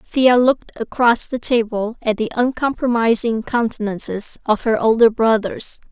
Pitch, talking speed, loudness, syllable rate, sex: 230 Hz, 130 wpm, -18 LUFS, 4.5 syllables/s, female